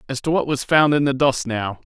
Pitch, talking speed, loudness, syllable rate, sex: 135 Hz, 285 wpm, -19 LUFS, 5.5 syllables/s, male